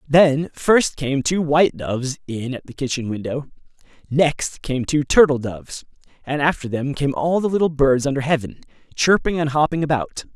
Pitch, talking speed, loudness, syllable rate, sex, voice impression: 140 Hz, 175 wpm, -20 LUFS, 5.0 syllables/s, male, masculine, adult-like, slightly tensed, fluent, slightly refreshing, sincere, lively